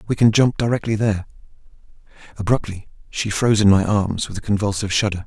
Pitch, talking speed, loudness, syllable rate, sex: 105 Hz, 170 wpm, -19 LUFS, 6.6 syllables/s, male